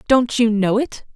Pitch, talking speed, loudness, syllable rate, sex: 230 Hz, 210 wpm, -18 LUFS, 4.4 syllables/s, female